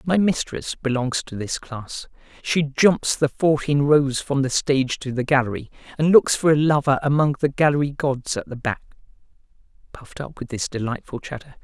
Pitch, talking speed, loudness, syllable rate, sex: 140 Hz, 180 wpm, -21 LUFS, 5.0 syllables/s, male